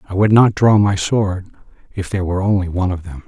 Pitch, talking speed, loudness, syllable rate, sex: 95 Hz, 240 wpm, -16 LUFS, 6.1 syllables/s, male